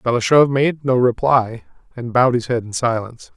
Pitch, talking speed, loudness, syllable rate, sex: 125 Hz, 180 wpm, -17 LUFS, 5.3 syllables/s, male